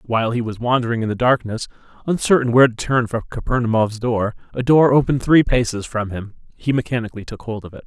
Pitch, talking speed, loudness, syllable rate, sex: 120 Hz, 205 wpm, -19 LUFS, 6.3 syllables/s, male